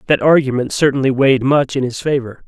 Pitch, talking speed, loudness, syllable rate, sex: 135 Hz, 195 wpm, -15 LUFS, 6.1 syllables/s, male